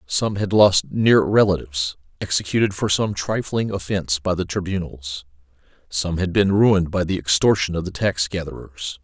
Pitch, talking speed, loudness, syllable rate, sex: 90 Hz, 160 wpm, -20 LUFS, 5.0 syllables/s, male